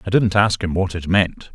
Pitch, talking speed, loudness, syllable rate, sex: 95 Hz, 270 wpm, -19 LUFS, 4.9 syllables/s, male